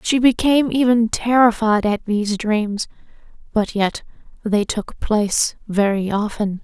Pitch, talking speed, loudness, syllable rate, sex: 220 Hz, 125 wpm, -18 LUFS, 4.2 syllables/s, female